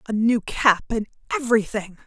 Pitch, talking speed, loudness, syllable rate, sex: 220 Hz, 145 wpm, -22 LUFS, 5.3 syllables/s, female